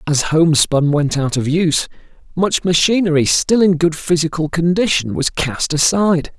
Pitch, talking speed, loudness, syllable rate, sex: 165 Hz, 150 wpm, -15 LUFS, 4.9 syllables/s, male